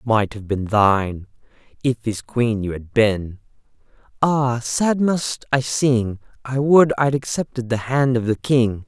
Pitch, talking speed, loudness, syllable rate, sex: 120 Hz, 170 wpm, -20 LUFS, 3.9 syllables/s, male